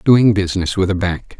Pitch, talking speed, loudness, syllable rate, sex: 95 Hz, 215 wpm, -16 LUFS, 5.4 syllables/s, male